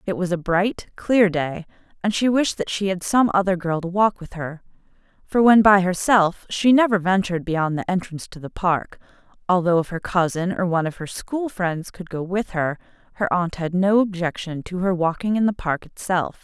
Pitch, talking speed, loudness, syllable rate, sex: 185 Hz, 210 wpm, -21 LUFS, 5.0 syllables/s, female